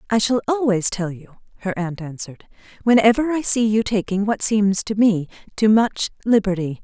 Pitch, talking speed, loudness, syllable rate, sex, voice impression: 205 Hz, 175 wpm, -19 LUFS, 5.3 syllables/s, female, feminine, very adult-like, clear, slightly fluent, slightly intellectual, sincere